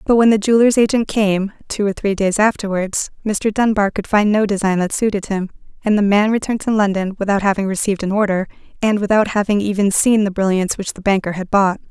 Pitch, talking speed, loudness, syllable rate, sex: 205 Hz, 215 wpm, -17 LUFS, 6.0 syllables/s, female